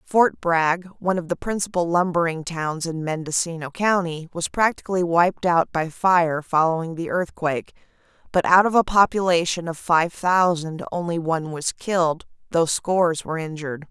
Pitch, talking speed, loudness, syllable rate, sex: 170 Hz, 155 wpm, -22 LUFS, 4.9 syllables/s, female